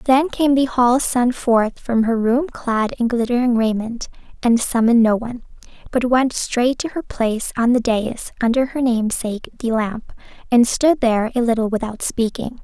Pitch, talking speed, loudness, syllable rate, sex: 240 Hz, 180 wpm, -18 LUFS, 4.8 syllables/s, female